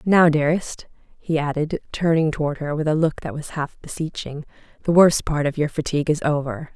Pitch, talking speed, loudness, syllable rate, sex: 155 Hz, 195 wpm, -21 LUFS, 5.4 syllables/s, female